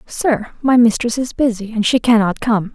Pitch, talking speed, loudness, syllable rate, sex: 230 Hz, 195 wpm, -16 LUFS, 4.7 syllables/s, female